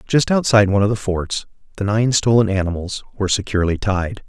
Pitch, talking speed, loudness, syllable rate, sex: 100 Hz, 180 wpm, -18 LUFS, 6.2 syllables/s, male